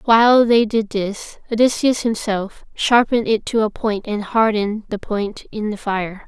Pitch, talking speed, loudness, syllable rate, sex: 220 Hz, 170 wpm, -18 LUFS, 4.5 syllables/s, female